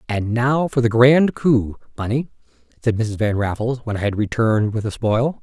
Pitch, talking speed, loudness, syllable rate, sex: 115 Hz, 200 wpm, -19 LUFS, 4.9 syllables/s, male